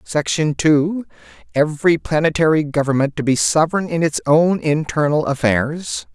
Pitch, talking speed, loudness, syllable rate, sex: 145 Hz, 125 wpm, -17 LUFS, 4.8 syllables/s, male